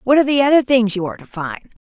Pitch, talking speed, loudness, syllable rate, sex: 240 Hz, 295 wpm, -16 LUFS, 7.4 syllables/s, female